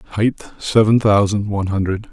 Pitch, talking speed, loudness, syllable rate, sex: 105 Hz, 140 wpm, -17 LUFS, 4.7 syllables/s, male